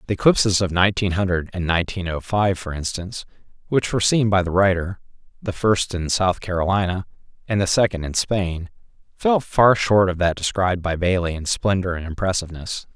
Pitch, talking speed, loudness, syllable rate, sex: 95 Hz, 180 wpm, -21 LUFS, 5.6 syllables/s, male